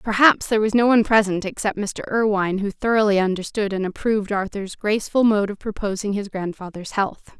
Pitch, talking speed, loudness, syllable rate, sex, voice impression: 205 Hz, 180 wpm, -21 LUFS, 5.8 syllables/s, female, feminine, adult-like, slightly fluent, slightly sincere, slightly calm, friendly